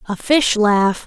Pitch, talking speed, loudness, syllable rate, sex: 230 Hz, 170 wpm, -15 LUFS, 3.4 syllables/s, female